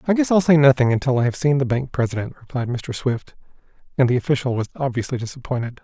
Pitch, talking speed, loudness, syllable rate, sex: 130 Hz, 215 wpm, -20 LUFS, 6.7 syllables/s, male